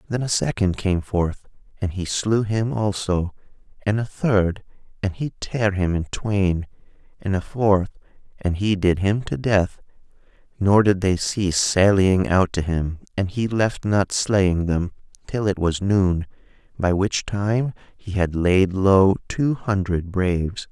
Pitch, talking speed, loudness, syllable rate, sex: 100 Hz, 160 wpm, -21 LUFS, 3.8 syllables/s, male